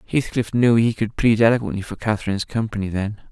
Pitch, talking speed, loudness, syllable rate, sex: 110 Hz, 180 wpm, -20 LUFS, 6.3 syllables/s, male